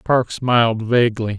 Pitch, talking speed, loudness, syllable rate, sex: 115 Hz, 130 wpm, -17 LUFS, 4.7 syllables/s, male